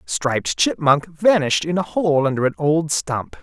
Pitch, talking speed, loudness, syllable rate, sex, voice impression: 150 Hz, 175 wpm, -19 LUFS, 4.6 syllables/s, male, masculine, adult-like, cool, slightly refreshing, sincere, slightly kind